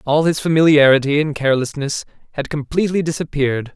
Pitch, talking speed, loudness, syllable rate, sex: 145 Hz, 130 wpm, -17 LUFS, 6.3 syllables/s, male